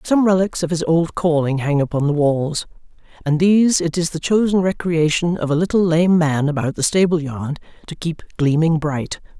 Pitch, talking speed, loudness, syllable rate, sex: 165 Hz, 190 wpm, -18 LUFS, 5.0 syllables/s, female